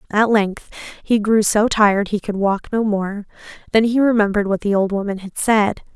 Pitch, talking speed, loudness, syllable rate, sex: 210 Hz, 200 wpm, -18 LUFS, 5.2 syllables/s, female